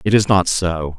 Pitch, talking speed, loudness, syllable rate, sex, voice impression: 90 Hz, 245 wpm, -17 LUFS, 4.5 syllables/s, male, very masculine, very middle-aged, very thick, very tensed, very powerful, slightly bright, soft, very clear, muffled, slightly halting, slightly raspy, very cool, very intellectual, slightly refreshing, sincere, very calm, very mature, friendly, reassuring, unique, elegant, slightly wild, sweet, lively, kind, slightly modest